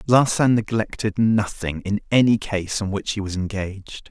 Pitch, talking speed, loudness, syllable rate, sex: 105 Hz, 160 wpm, -21 LUFS, 4.7 syllables/s, male